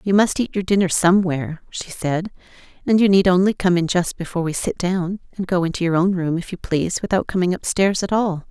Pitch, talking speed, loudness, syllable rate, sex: 180 Hz, 235 wpm, -20 LUFS, 5.9 syllables/s, female